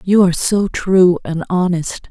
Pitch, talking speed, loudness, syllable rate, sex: 180 Hz, 170 wpm, -15 LUFS, 4.2 syllables/s, female